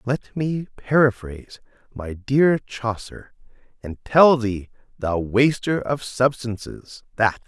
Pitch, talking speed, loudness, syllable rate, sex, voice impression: 120 Hz, 110 wpm, -21 LUFS, 3.5 syllables/s, male, masculine, middle-aged, powerful, halting, mature, friendly, reassuring, wild, lively, kind, slightly intense